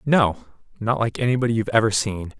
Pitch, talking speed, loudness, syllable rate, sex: 110 Hz, 175 wpm, -21 LUFS, 6.7 syllables/s, male